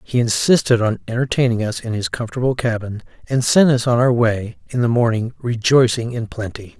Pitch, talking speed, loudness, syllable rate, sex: 115 Hz, 185 wpm, -18 LUFS, 5.5 syllables/s, male